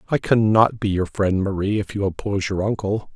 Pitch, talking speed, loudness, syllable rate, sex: 100 Hz, 210 wpm, -21 LUFS, 5.5 syllables/s, male